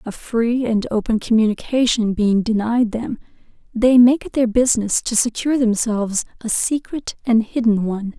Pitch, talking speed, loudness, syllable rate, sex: 230 Hz, 155 wpm, -18 LUFS, 5.0 syllables/s, female